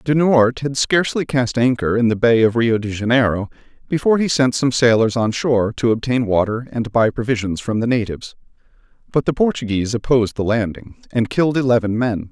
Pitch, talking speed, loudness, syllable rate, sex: 120 Hz, 185 wpm, -18 LUFS, 5.7 syllables/s, male